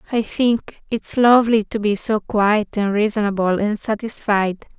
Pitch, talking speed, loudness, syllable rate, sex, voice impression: 215 Hz, 150 wpm, -19 LUFS, 4.3 syllables/s, female, very feminine, slightly young, adult-like, slightly thin, slightly relaxed, weak, slightly dark, soft, slightly muffled, slightly halting, cute, intellectual, slightly refreshing, very sincere, very calm, friendly, reassuring, unique, very elegant, sweet, very kind, modest, slightly light